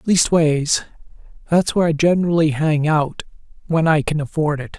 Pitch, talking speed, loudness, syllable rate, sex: 155 Hz, 150 wpm, -18 LUFS, 5.1 syllables/s, male